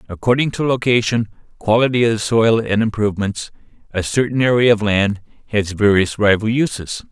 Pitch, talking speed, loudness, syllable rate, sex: 110 Hz, 150 wpm, -17 LUFS, 5.4 syllables/s, male